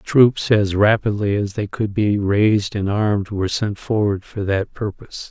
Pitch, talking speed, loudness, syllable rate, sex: 105 Hz, 180 wpm, -19 LUFS, 4.6 syllables/s, male